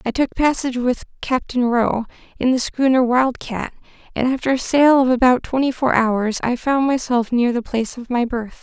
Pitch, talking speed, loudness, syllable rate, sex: 250 Hz, 200 wpm, -18 LUFS, 5.2 syllables/s, female